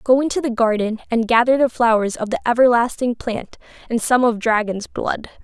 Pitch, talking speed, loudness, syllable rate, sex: 235 Hz, 190 wpm, -18 LUFS, 5.3 syllables/s, female